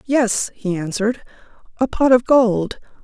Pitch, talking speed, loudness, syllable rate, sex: 230 Hz, 140 wpm, -18 LUFS, 4.2 syllables/s, female